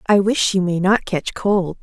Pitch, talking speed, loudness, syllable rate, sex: 190 Hz, 230 wpm, -18 LUFS, 4.2 syllables/s, female